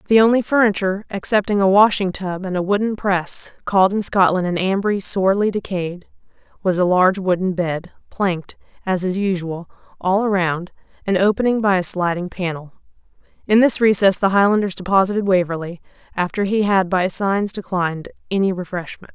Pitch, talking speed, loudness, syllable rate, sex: 190 Hz, 155 wpm, -18 LUFS, 5.5 syllables/s, female